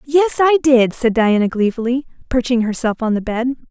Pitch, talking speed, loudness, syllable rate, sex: 250 Hz, 180 wpm, -16 LUFS, 5.1 syllables/s, female